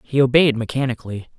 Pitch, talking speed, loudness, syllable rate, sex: 125 Hz, 130 wpm, -18 LUFS, 6.6 syllables/s, male